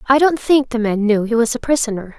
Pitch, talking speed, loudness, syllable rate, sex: 240 Hz, 275 wpm, -16 LUFS, 6.0 syllables/s, female